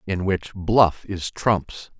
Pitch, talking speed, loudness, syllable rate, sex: 95 Hz, 150 wpm, -22 LUFS, 3.1 syllables/s, male